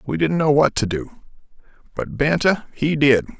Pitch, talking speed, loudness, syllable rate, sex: 135 Hz, 175 wpm, -19 LUFS, 4.6 syllables/s, male